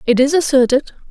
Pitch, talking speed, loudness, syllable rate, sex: 270 Hz, 165 wpm, -14 LUFS, 6.8 syllables/s, female